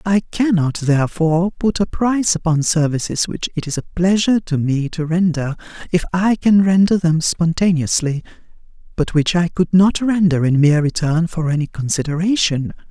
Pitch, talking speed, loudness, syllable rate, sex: 170 Hz, 165 wpm, -17 LUFS, 5.1 syllables/s, female